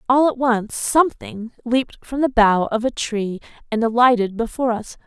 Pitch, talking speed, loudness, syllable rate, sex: 235 Hz, 155 wpm, -19 LUFS, 5.0 syllables/s, female